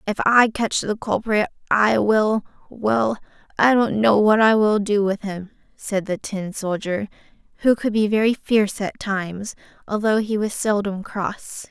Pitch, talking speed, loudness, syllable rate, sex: 210 Hz, 165 wpm, -20 LUFS, 4.2 syllables/s, female